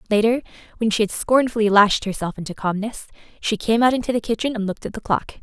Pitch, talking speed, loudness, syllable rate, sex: 220 Hz, 220 wpm, -21 LUFS, 6.7 syllables/s, female